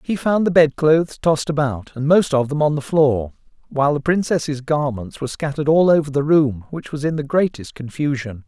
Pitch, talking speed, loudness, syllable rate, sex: 145 Hz, 205 wpm, -19 LUFS, 5.5 syllables/s, male